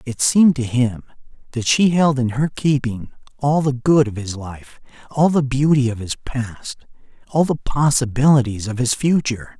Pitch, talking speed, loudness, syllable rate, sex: 130 Hz, 175 wpm, -18 LUFS, 4.7 syllables/s, male